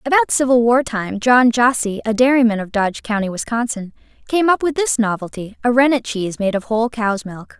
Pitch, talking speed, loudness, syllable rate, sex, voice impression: 235 Hz, 200 wpm, -17 LUFS, 5.6 syllables/s, female, very feminine, young, slightly adult-like, very thin, very tensed, powerful, very bright, hard, very clear, fluent, very cute, slightly intellectual, very refreshing, slightly sincere, very friendly, very reassuring, very unique, wild, sweet, very lively, slightly strict, slightly intense, slightly sharp